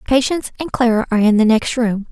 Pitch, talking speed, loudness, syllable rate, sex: 235 Hz, 225 wpm, -16 LUFS, 6.5 syllables/s, female